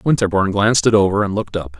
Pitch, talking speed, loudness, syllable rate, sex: 100 Hz, 235 wpm, -16 LUFS, 7.7 syllables/s, male